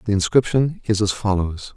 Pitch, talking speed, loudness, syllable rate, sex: 105 Hz, 170 wpm, -20 LUFS, 5.1 syllables/s, male